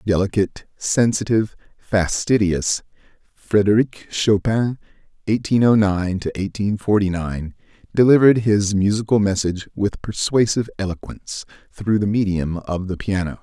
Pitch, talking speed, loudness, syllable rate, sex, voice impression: 100 Hz, 110 wpm, -19 LUFS, 4.2 syllables/s, male, very masculine, very middle-aged, very thick, slightly relaxed, powerful, slightly bright, slightly soft, muffled, fluent, slightly raspy, very cool, intellectual, slightly refreshing, sincere, calm, very mature, friendly, reassuring, very unique, slightly elegant, wild, sweet, lively, very kind, modest